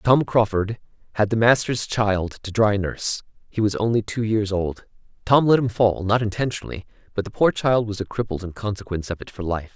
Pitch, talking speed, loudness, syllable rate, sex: 105 Hz, 210 wpm, -22 LUFS, 5.5 syllables/s, male